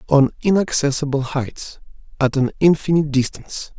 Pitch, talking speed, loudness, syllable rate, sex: 145 Hz, 95 wpm, -19 LUFS, 5.3 syllables/s, male